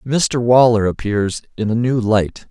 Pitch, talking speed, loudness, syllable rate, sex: 115 Hz, 165 wpm, -16 LUFS, 4.0 syllables/s, male